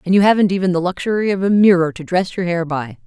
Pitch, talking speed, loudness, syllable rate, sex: 180 Hz, 275 wpm, -16 LUFS, 6.5 syllables/s, female